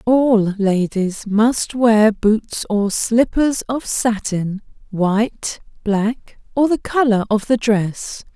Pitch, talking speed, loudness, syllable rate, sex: 220 Hz, 120 wpm, -18 LUFS, 3.0 syllables/s, female